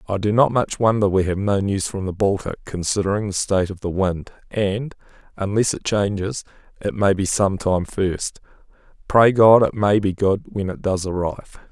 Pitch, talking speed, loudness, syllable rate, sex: 100 Hz, 195 wpm, -20 LUFS, 4.9 syllables/s, male